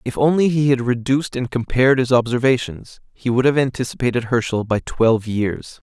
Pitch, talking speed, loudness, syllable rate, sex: 125 Hz, 175 wpm, -18 LUFS, 5.5 syllables/s, male